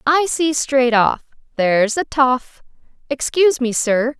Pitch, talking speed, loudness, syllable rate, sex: 265 Hz, 130 wpm, -17 LUFS, 4.0 syllables/s, female